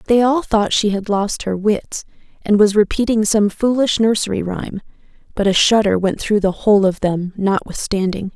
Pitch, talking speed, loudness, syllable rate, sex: 205 Hz, 180 wpm, -17 LUFS, 5.0 syllables/s, female